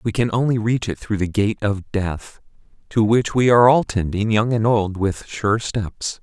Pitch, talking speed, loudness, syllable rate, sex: 110 Hz, 210 wpm, -19 LUFS, 4.4 syllables/s, male